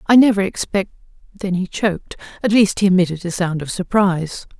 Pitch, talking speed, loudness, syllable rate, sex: 190 Hz, 185 wpm, -18 LUFS, 5.7 syllables/s, female